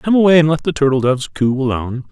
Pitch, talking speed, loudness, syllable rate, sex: 145 Hz, 255 wpm, -15 LUFS, 6.9 syllables/s, male